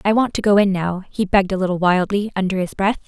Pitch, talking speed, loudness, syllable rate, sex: 195 Hz, 275 wpm, -18 LUFS, 6.4 syllables/s, female